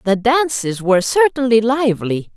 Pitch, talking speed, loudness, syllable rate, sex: 235 Hz, 125 wpm, -16 LUFS, 5.0 syllables/s, female